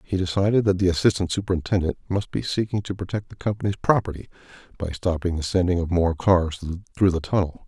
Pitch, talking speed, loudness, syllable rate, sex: 90 Hz, 190 wpm, -23 LUFS, 6.3 syllables/s, male